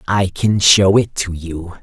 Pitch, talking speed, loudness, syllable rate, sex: 95 Hz, 195 wpm, -14 LUFS, 3.7 syllables/s, male